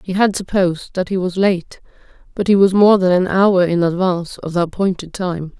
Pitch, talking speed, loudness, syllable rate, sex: 185 Hz, 215 wpm, -16 LUFS, 5.3 syllables/s, female